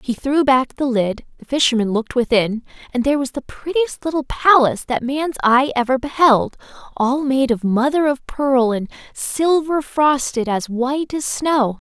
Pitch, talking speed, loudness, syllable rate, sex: 265 Hz, 170 wpm, -18 LUFS, 4.7 syllables/s, female